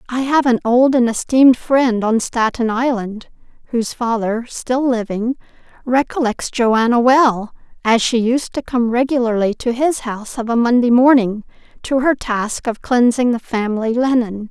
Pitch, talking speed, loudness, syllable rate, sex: 240 Hz, 155 wpm, -16 LUFS, 4.6 syllables/s, female